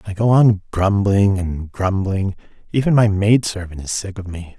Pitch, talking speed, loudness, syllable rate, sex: 100 Hz, 170 wpm, -18 LUFS, 4.5 syllables/s, male